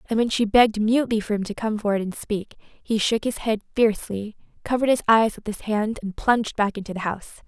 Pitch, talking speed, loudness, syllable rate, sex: 215 Hz, 235 wpm, -23 LUFS, 6.0 syllables/s, female